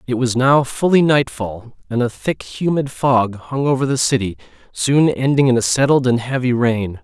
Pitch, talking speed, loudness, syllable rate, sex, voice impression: 130 Hz, 195 wpm, -17 LUFS, 4.7 syllables/s, male, very masculine, very adult-like, very middle-aged, very thick, relaxed, slightly weak, bright, soft, clear, fluent, very cool, intellectual, very sincere, very calm, mature, very friendly, very reassuring, unique, slightly elegant, wild, sweet, lively, kind, slightly modest